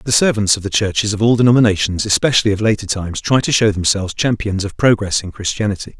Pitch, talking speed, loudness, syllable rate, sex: 105 Hz, 210 wpm, -16 LUFS, 6.6 syllables/s, male